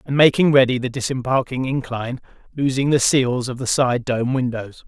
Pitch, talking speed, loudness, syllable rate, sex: 130 Hz, 170 wpm, -19 LUFS, 5.5 syllables/s, male